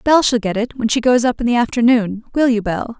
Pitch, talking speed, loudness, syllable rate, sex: 235 Hz, 280 wpm, -16 LUFS, 5.7 syllables/s, female